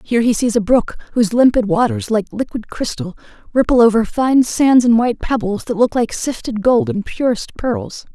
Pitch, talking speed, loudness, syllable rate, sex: 235 Hz, 190 wpm, -16 LUFS, 5.2 syllables/s, female